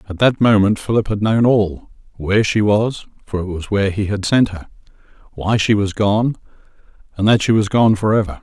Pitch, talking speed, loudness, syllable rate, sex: 105 Hz, 200 wpm, -16 LUFS, 4.5 syllables/s, male